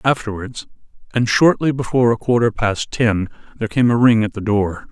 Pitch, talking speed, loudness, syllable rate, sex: 115 Hz, 185 wpm, -17 LUFS, 5.4 syllables/s, male